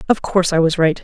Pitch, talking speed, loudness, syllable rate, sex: 175 Hz, 290 wpm, -16 LUFS, 7.1 syllables/s, female